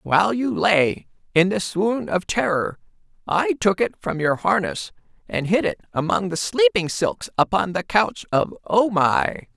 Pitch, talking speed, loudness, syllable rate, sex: 170 Hz, 170 wpm, -21 LUFS, 4.1 syllables/s, male